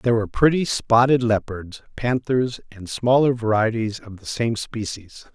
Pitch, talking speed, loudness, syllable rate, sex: 115 Hz, 145 wpm, -21 LUFS, 4.7 syllables/s, male